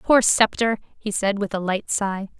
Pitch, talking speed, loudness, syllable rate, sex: 205 Hz, 200 wpm, -21 LUFS, 4.4 syllables/s, female